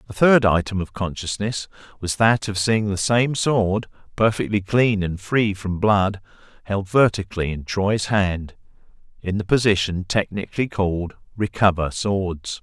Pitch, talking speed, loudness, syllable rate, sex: 100 Hz, 145 wpm, -21 LUFS, 3.2 syllables/s, male